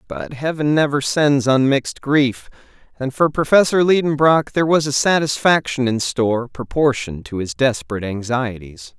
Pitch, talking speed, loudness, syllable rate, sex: 135 Hz, 140 wpm, -18 LUFS, 5.0 syllables/s, male